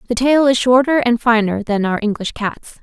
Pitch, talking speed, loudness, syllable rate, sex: 235 Hz, 215 wpm, -16 LUFS, 5.1 syllables/s, female